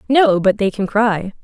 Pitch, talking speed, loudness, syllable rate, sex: 210 Hz, 210 wpm, -16 LUFS, 4.3 syllables/s, female